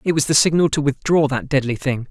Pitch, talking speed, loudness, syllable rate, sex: 140 Hz, 255 wpm, -18 LUFS, 6.0 syllables/s, male